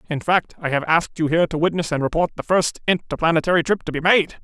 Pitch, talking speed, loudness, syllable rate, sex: 165 Hz, 245 wpm, -20 LUFS, 6.7 syllables/s, male